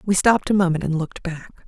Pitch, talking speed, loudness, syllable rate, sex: 180 Hz, 250 wpm, -20 LUFS, 6.9 syllables/s, female